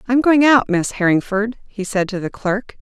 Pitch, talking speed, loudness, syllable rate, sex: 215 Hz, 230 wpm, -17 LUFS, 5.2 syllables/s, female